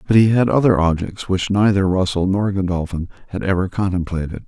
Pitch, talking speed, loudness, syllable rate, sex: 95 Hz, 175 wpm, -18 LUFS, 5.7 syllables/s, male